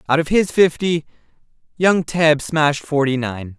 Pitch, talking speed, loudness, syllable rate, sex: 150 Hz, 150 wpm, -17 LUFS, 4.4 syllables/s, male